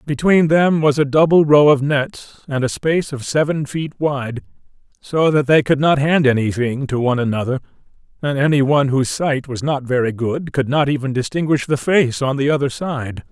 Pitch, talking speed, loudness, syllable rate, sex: 140 Hz, 200 wpm, -17 LUFS, 5.1 syllables/s, male